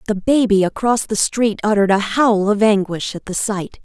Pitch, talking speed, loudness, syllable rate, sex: 210 Hz, 205 wpm, -17 LUFS, 5.0 syllables/s, female